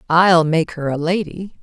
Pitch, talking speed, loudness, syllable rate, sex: 170 Hz, 185 wpm, -17 LUFS, 4.2 syllables/s, female